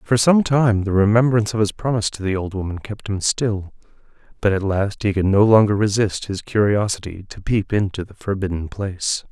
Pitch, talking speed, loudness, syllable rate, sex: 105 Hz, 200 wpm, -19 LUFS, 5.4 syllables/s, male